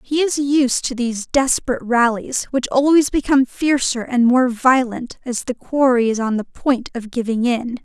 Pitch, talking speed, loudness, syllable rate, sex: 250 Hz, 185 wpm, -18 LUFS, 4.8 syllables/s, female